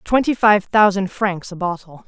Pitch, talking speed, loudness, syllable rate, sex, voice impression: 195 Hz, 175 wpm, -17 LUFS, 4.6 syllables/s, female, very feminine, adult-like, middle-aged, thin, tensed, powerful, slightly dark, very hard, clear, fluent, slightly cool, intellectual, refreshing, slightly sincere, slightly calm, slightly friendly, slightly reassuring, slightly elegant, slightly lively, strict, slightly intense, slightly sharp